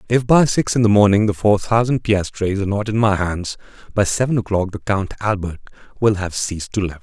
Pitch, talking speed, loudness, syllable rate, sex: 105 Hz, 220 wpm, -18 LUFS, 5.7 syllables/s, male